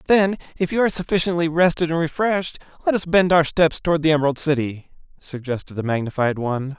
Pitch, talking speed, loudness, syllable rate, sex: 160 Hz, 185 wpm, -20 LUFS, 6.3 syllables/s, male